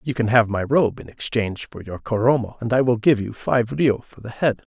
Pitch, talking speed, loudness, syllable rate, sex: 115 Hz, 250 wpm, -21 LUFS, 5.4 syllables/s, male